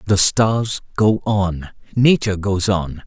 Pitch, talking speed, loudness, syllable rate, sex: 100 Hz, 135 wpm, -18 LUFS, 3.5 syllables/s, male